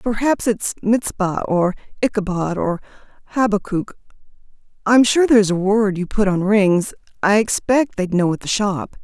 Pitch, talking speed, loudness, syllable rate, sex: 205 Hz, 145 wpm, -18 LUFS, 5.2 syllables/s, female